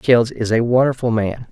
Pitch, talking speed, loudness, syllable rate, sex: 120 Hz, 200 wpm, -17 LUFS, 4.8 syllables/s, male